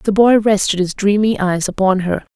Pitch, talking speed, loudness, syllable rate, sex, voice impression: 200 Hz, 205 wpm, -15 LUFS, 4.9 syllables/s, female, feminine, slightly adult-like, soft, slightly muffled, friendly, reassuring